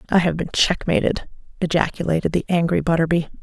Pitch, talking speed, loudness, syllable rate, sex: 165 Hz, 140 wpm, -20 LUFS, 6.1 syllables/s, female